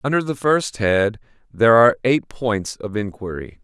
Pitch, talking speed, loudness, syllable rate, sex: 115 Hz, 165 wpm, -19 LUFS, 4.8 syllables/s, male